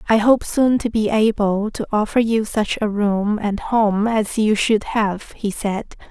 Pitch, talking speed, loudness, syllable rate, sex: 215 Hz, 195 wpm, -19 LUFS, 3.9 syllables/s, female